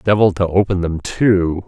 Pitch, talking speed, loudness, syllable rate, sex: 95 Hz, 180 wpm, -16 LUFS, 4.6 syllables/s, male